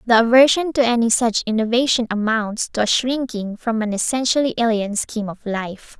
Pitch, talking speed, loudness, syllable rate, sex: 230 Hz, 170 wpm, -19 LUFS, 5.4 syllables/s, female